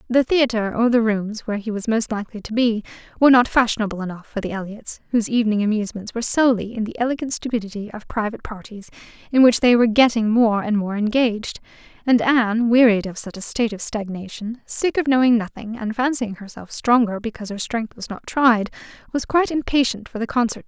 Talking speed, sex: 205 wpm, female